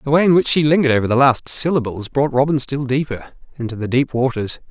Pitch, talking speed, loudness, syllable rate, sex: 135 Hz, 230 wpm, -17 LUFS, 6.3 syllables/s, male